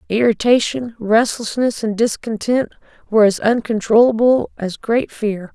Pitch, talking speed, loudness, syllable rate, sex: 225 Hz, 110 wpm, -17 LUFS, 4.5 syllables/s, female